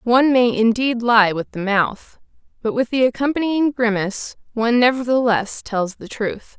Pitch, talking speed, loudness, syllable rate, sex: 235 Hz, 155 wpm, -19 LUFS, 4.8 syllables/s, female